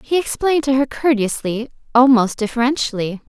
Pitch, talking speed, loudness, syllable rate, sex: 250 Hz, 105 wpm, -17 LUFS, 5.6 syllables/s, female